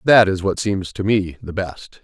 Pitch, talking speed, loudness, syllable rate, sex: 95 Hz, 235 wpm, -19 LUFS, 4.2 syllables/s, male